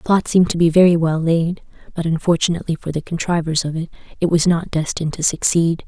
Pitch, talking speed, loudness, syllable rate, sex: 165 Hz, 215 wpm, -18 LUFS, 6.3 syllables/s, female